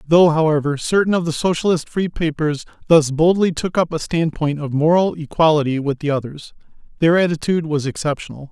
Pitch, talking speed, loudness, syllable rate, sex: 160 Hz, 170 wpm, -18 LUFS, 5.7 syllables/s, male